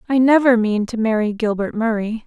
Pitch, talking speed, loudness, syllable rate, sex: 225 Hz, 185 wpm, -18 LUFS, 5.3 syllables/s, female